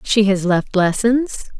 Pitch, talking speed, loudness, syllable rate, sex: 210 Hz, 150 wpm, -17 LUFS, 3.5 syllables/s, female